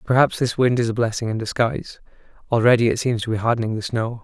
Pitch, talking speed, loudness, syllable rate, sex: 115 Hz, 225 wpm, -20 LUFS, 6.6 syllables/s, male